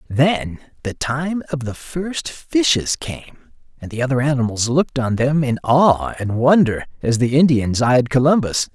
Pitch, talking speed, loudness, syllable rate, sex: 135 Hz, 165 wpm, -18 LUFS, 4.3 syllables/s, male